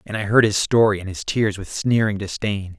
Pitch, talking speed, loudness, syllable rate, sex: 100 Hz, 235 wpm, -20 LUFS, 5.2 syllables/s, male